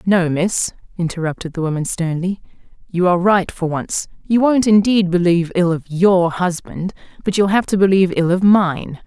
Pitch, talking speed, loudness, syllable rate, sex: 180 Hz, 180 wpm, -17 LUFS, 5.1 syllables/s, female